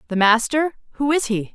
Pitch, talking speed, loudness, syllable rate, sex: 250 Hz, 155 wpm, -20 LUFS, 5.2 syllables/s, female